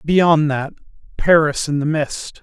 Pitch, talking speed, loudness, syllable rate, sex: 155 Hz, 150 wpm, -17 LUFS, 3.7 syllables/s, male